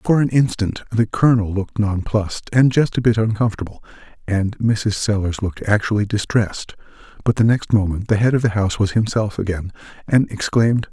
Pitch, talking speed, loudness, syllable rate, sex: 105 Hz, 175 wpm, -19 LUFS, 5.7 syllables/s, male